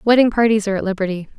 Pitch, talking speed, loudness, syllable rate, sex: 210 Hz, 215 wpm, -17 LUFS, 8.2 syllables/s, female